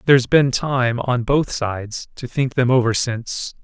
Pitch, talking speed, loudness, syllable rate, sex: 125 Hz, 180 wpm, -19 LUFS, 4.5 syllables/s, male